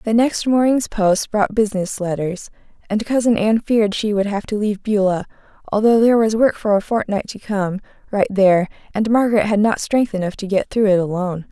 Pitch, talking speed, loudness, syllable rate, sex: 210 Hz, 205 wpm, -18 LUFS, 5.6 syllables/s, female